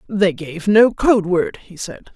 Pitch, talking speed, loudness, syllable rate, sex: 195 Hz, 195 wpm, -16 LUFS, 3.7 syllables/s, female